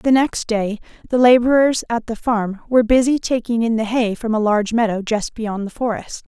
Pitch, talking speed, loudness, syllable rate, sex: 230 Hz, 210 wpm, -18 LUFS, 5.2 syllables/s, female